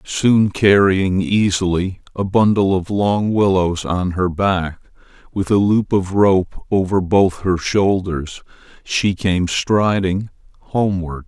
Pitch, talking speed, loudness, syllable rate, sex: 95 Hz, 130 wpm, -17 LUFS, 3.5 syllables/s, male